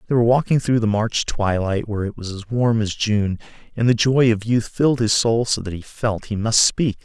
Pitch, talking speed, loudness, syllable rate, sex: 110 Hz, 245 wpm, -19 LUFS, 5.3 syllables/s, male